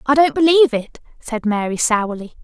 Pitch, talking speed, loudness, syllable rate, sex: 250 Hz, 170 wpm, -17 LUFS, 5.4 syllables/s, female